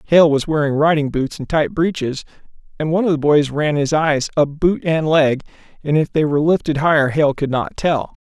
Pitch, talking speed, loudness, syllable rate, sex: 150 Hz, 220 wpm, -17 LUFS, 5.3 syllables/s, male